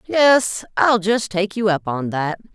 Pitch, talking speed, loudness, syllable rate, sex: 205 Hz, 190 wpm, -18 LUFS, 3.7 syllables/s, female